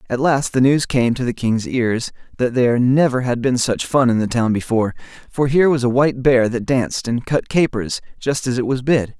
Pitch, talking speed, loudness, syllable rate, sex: 125 Hz, 235 wpm, -18 LUFS, 5.4 syllables/s, male